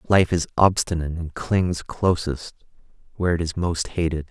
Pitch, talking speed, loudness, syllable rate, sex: 85 Hz, 155 wpm, -23 LUFS, 4.9 syllables/s, male